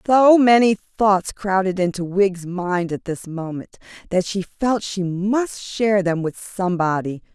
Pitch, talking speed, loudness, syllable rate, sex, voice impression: 190 Hz, 155 wpm, -20 LUFS, 4.2 syllables/s, female, slightly feminine, very adult-like, clear, slightly sincere, slightly unique